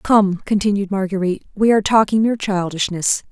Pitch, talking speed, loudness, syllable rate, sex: 200 Hz, 145 wpm, -18 LUFS, 5.8 syllables/s, female